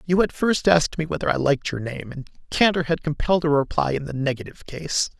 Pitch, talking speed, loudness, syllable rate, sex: 150 Hz, 230 wpm, -22 LUFS, 6.2 syllables/s, male